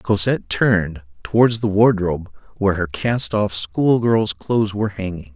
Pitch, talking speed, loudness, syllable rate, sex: 100 Hz, 145 wpm, -19 LUFS, 4.9 syllables/s, male